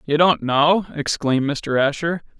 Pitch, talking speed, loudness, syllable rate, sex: 150 Hz, 150 wpm, -19 LUFS, 4.5 syllables/s, male